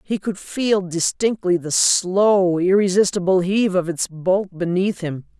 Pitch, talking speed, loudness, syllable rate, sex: 185 Hz, 145 wpm, -19 LUFS, 4.0 syllables/s, female